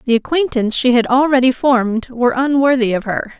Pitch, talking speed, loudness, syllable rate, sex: 250 Hz, 175 wpm, -15 LUFS, 5.9 syllables/s, female